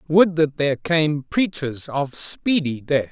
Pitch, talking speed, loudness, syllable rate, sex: 150 Hz, 155 wpm, -21 LUFS, 3.7 syllables/s, male